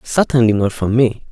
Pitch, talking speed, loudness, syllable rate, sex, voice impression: 120 Hz, 180 wpm, -15 LUFS, 5.0 syllables/s, male, masculine, adult-like, slightly middle-aged, thick, relaxed, weak, very dark, soft, muffled, slightly halting, slightly raspy, slightly cool, slightly intellectual, sincere, slightly calm, mature, slightly friendly, slightly reassuring, very unique, wild, slightly sweet, kind, very modest